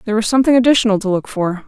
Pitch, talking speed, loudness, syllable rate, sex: 215 Hz, 250 wpm, -15 LUFS, 8.6 syllables/s, female